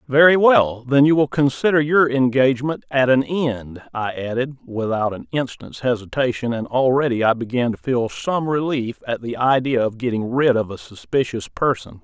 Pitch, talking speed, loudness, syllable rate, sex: 130 Hz, 175 wpm, -19 LUFS, 4.9 syllables/s, male